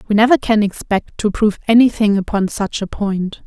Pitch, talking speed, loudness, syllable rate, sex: 210 Hz, 210 wpm, -16 LUFS, 5.4 syllables/s, female